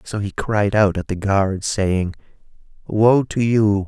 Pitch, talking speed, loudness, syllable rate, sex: 100 Hz, 170 wpm, -19 LUFS, 3.6 syllables/s, male